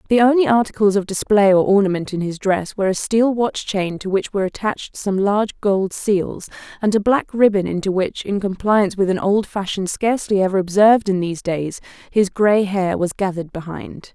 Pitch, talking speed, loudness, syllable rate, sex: 200 Hz, 200 wpm, -18 LUFS, 5.5 syllables/s, female